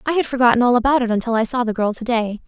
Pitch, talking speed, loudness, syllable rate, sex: 240 Hz, 290 wpm, -18 LUFS, 7.3 syllables/s, female